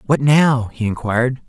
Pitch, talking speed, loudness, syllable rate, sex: 125 Hz, 160 wpm, -17 LUFS, 4.8 syllables/s, male